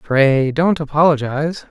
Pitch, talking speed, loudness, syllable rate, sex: 150 Hz, 105 wpm, -16 LUFS, 4.4 syllables/s, male